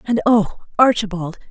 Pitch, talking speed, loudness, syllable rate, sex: 205 Hz, 120 wpm, -17 LUFS, 4.7 syllables/s, female